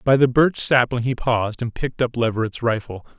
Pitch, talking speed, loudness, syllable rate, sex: 120 Hz, 205 wpm, -20 LUFS, 5.7 syllables/s, male